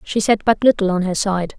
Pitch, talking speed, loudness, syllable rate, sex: 200 Hz, 265 wpm, -17 LUFS, 5.4 syllables/s, female